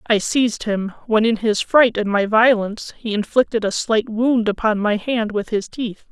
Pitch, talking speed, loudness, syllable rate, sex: 220 Hz, 205 wpm, -19 LUFS, 4.7 syllables/s, female